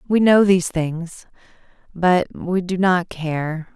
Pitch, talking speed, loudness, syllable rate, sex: 175 Hz, 145 wpm, -19 LUFS, 3.5 syllables/s, female